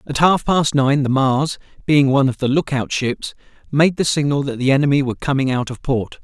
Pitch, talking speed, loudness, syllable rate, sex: 140 Hz, 230 wpm, -18 LUFS, 5.5 syllables/s, male